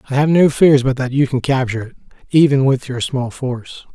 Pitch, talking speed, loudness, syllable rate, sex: 135 Hz, 230 wpm, -16 LUFS, 5.7 syllables/s, male